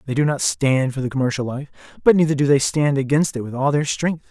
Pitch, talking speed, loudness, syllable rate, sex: 140 Hz, 265 wpm, -19 LUFS, 6.1 syllables/s, male